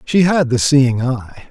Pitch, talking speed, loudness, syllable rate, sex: 135 Hz, 200 wpm, -15 LUFS, 3.7 syllables/s, male